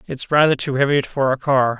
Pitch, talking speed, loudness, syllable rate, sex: 135 Hz, 235 wpm, -18 LUFS, 5.5 syllables/s, male